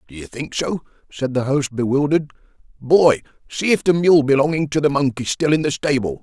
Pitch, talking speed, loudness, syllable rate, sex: 140 Hz, 210 wpm, -18 LUFS, 5.6 syllables/s, male